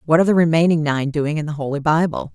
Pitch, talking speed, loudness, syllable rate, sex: 155 Hz, 255 wpm, -18 LUFS, 6.8 syllables/s, female